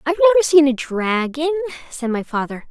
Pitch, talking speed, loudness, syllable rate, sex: 290 Hz, 180 wpm, -18 LUFS, 7.3 syllables/s, female